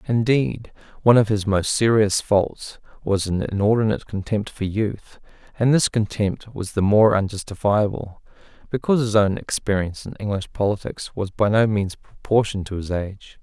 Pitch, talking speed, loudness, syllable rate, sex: 105 Hz, 155 wpm, -21 LUFS, 5.1 syllables/s, male